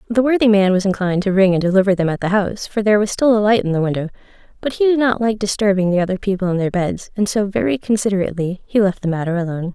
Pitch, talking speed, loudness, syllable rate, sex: 200 Hz, 265 wpm, -17 LUFS, 7.2 syllables/s, female